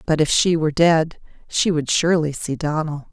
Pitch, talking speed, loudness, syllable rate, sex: 160 Hz, 190 wpm, -19 LUFS, 5.2 syllables/s, female